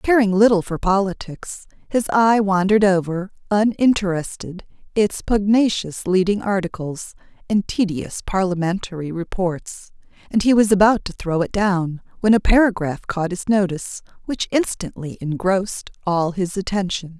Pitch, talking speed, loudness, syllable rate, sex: 195 Hz, 130 wpm, -20 LUFS, 4.7 syllables/s, female